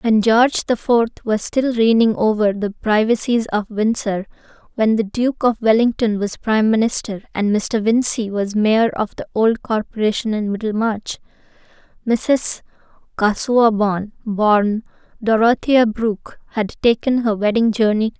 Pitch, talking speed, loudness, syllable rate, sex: 220 Hz, 140 wpm, -18 LUFS, 4.5 syllables/s, female